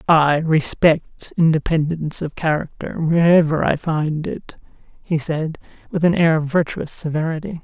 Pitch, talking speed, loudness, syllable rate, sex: 160 Hz, 135 wpm, -19 LUFS, 4.5 syllables/s, female